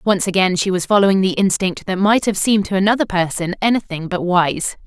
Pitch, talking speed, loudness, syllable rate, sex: 195 Hz, 210 wpm, -17 LUFS, 5.8 syllables/s, female